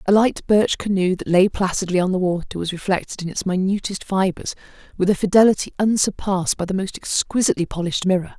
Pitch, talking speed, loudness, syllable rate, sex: 190 Hz, 185 wpm, -20 LUFS, 6.2 syllables/s, female